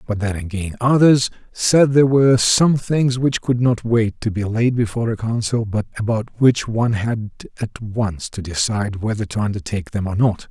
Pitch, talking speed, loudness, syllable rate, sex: 110 Hz, 195 wpm, -18 LUFS, 5.1 syllables/s, male